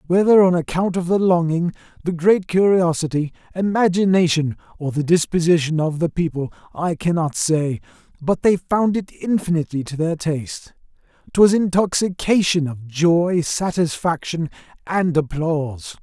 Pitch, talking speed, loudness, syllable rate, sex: 170 Hz, 125 wpm, -19 LUFS, 4.7 syllables/s, male